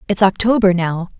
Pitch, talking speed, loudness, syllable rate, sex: 195 Hz, 150 wpm, -15 LUFS, 5.2 syllables/s, female